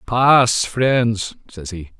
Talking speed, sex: 120 wpm, male